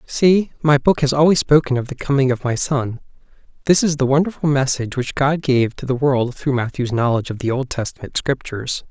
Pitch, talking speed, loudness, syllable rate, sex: 135 Hz, 210 wpm, -18 LUFS, 5.6 syllables/s, male